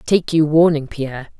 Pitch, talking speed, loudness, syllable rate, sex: 155 Hz, 170 wpm, -17 LUFS, 4.9 syllables/s, female